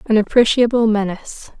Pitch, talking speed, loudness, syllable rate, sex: 220 Hz, 115 wpm, -15 LUFS, 5.6 syllables/s, female